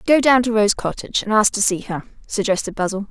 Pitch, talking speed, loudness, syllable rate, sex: 215 Hz, 230 wpm, -18 LUFS, 6.2 syllables/s, female